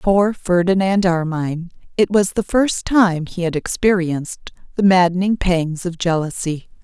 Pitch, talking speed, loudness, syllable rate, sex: 180 Hz, 140 wpm, -18 LUFS, 4.5 syllables/s, female